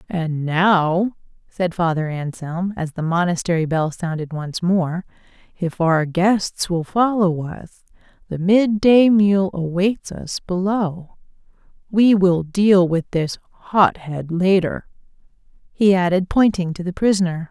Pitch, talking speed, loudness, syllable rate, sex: 180 Hz, 135 wpm, -19 LUFS, 3.8 syllables/s, female